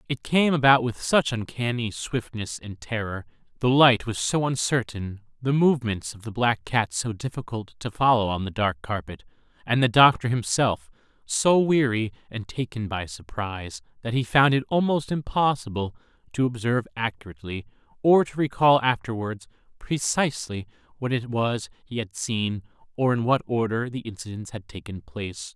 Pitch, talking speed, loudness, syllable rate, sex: 115 Hz, 155 wpm, -24 LUFS, 4.9 syllables/s, male